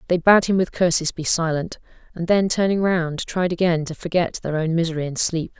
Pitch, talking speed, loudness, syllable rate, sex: 170 Hz, 215 wpm, -20 LUFS, 5.4 syllables/s, female